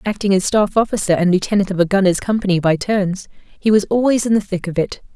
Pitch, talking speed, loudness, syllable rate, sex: 195 Hz, 235 wpm, -17 LUFS, 6.3 syllables/s, female